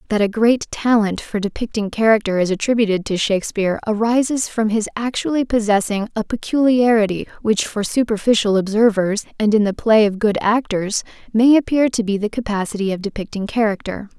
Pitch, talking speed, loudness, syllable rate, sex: 215 Hz, 160 wpm, -18 LUFS, 5.6 syllables/s, female